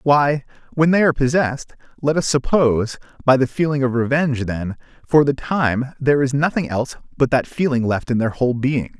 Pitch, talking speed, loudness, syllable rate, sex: 135 Hz, 195 wpm, -19 LUFS, 5.6 syllables/s, male